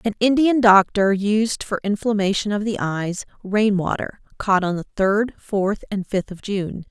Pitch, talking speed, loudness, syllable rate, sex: 205 Hz, 175 wpm, -20 LUFS, 4.2 syllables/s, female